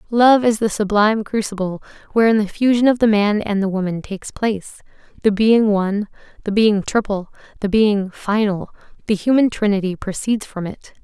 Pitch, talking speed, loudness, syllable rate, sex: 210 Hz, 170 wpm, -18 LUFS, 5.2 syllables/s, female